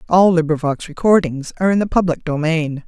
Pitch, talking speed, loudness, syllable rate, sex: 165 Hz, 165 wpm, -17 LUFS, 5.8 syllables/s, female